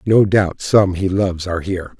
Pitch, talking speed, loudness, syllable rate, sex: 95 Hz, 210 wpm, -17 LUFS, 5.4 syllables/s, male